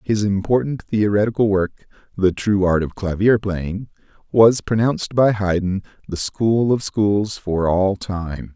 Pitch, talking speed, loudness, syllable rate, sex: 100 Hz, 145 wpm, -19 LUFS, 4.0 syllables/s, male